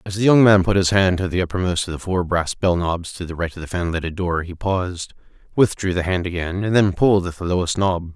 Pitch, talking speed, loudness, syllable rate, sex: 90 Hz, 265 wpm, -20 LUFS, 5.9 syllables/s, male